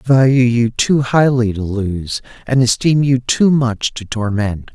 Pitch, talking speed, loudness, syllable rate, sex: 120 Hz, 175 wpm, -15 LUFS, 4.1 syllables/s, male